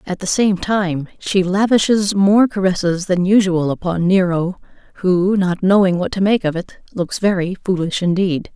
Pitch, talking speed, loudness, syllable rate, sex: 185 Hz, 170 wpm, -17 LUFS, 4.7 syllables/s, female